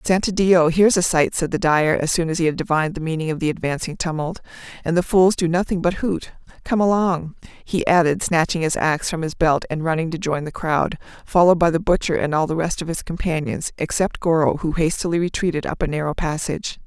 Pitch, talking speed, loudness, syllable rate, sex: 165 Hz, 220 wpm, -20 LUFS, 5.8 syllables/s, female